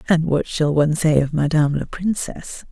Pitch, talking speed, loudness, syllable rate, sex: 155 Hz, 200 wpm, -19 LUFS, 5.8 syllables/s, female